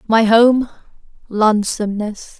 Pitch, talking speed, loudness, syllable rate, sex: 220 Hz, 75 wpm, -15 LUFS, 4.2 syllables/s, female